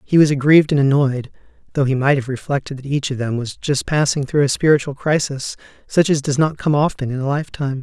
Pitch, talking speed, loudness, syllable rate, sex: 140 Hz, 230 wpm, -18 LUFS, 6.1 syllables/s, male